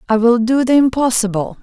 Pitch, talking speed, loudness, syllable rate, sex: 240 Hz, 185 wpm, -14 LUFS, 5.6 syllables/s, female